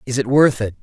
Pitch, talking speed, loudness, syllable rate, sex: 125 Hz, 290 wpm, -16 LUFS, 6.2 syllables/s, male